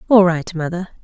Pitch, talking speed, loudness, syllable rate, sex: 180 Hz, 175 wpm, -17 LUFS, 5.6 syllables/s, female